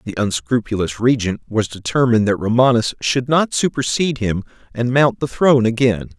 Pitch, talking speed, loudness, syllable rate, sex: 120 Hz, 155 wpm, -17 LUFS, 5.4 syllables/s, male